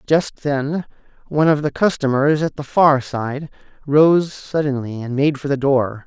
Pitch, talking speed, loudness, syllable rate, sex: 145 Hz, 170 wpm, -18 LUFS, 4.3 syllables/s, male